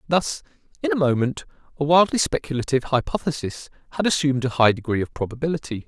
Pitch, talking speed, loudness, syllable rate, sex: 140 Hz, 155 wpm, -22 LUFS, 6.6 syllables/s, male